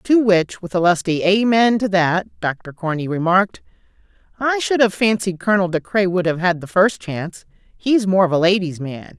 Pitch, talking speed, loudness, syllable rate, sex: 190 Hz, 195 wpm, -18 LUFS, 4.9 syllables/s, female